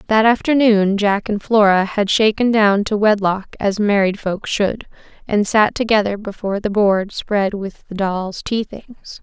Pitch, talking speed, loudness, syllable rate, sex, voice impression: 205 Hz, 170 wpm, -17 LUFS, 4.2 syllables/s, female, feminine, slightly adult-like, slightly refreshing, sincere, slightly friendly